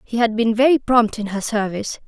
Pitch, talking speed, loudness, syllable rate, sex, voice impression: 225 Hz, 230 wpm, -18 LUFS, 5.7 syllables/s, female, feminine, slightly young, cute, slightly refreshing, friendly, slightly lively, slightly kind